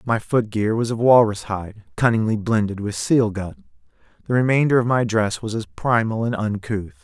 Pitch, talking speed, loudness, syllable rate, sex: 110 Hz, 190 wpm, -20 LUFS, 5.0 syllables/s, male